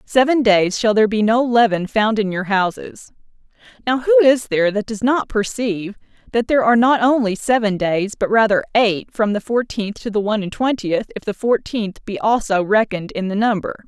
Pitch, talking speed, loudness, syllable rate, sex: 220 Hz, 200 wpm, -18 LUFS, 5.3 syllables/s, female